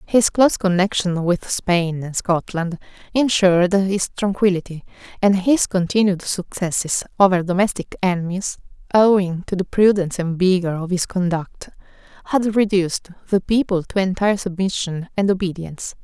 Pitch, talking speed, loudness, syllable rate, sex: 185 Hz, 130 wpm, -19 LUFS, 5.0 syllables/s, female